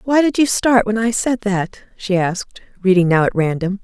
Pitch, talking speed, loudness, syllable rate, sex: 205 Hz, 220 wpm, -17 LUFS, 5.0 syllables/s, female